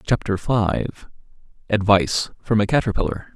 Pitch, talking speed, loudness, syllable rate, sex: 100 Hz, 105 wpm, -21 LUFS, 4.8 syllables/s, male